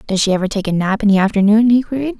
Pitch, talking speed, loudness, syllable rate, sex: 210 Hz, 300 wpm, -15 LUFS, 7.4 syllables/s, female